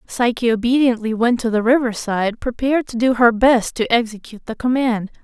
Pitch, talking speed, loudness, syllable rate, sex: 235 Hz, 170 wpm, -17 LUFS, 5.5 syllables/s, female